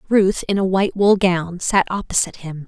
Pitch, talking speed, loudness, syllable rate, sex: 190 Hz, 200 wpm, -18 LUFS, 5.3 syllables/s, female